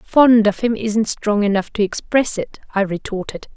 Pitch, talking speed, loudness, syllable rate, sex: 215 Hz, 185 wpm, -18 LUFS, 4.6 syllables/s, female